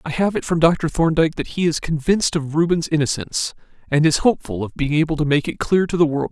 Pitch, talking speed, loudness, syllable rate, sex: 160 Hz, 245 wpm, -19 LUFS, 6.4 syllables/s, male